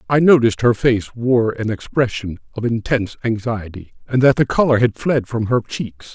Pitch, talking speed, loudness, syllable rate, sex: 115 Hz, 185 wpm, -18 LUFS, 5.1 syllables/s, male